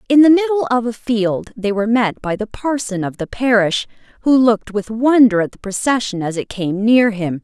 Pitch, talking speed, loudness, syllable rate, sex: 225 Hz, 220 wpm, -16 LUFS, 5.1 syllables/s, female